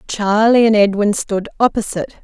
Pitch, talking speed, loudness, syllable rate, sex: 210 Hz, 135 wpm, -15 LUFS, 5.2 syllables/s, female